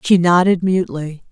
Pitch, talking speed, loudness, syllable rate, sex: 175 Hz, 135 wpm, -15 LUFS, 5.2 syllables/s, female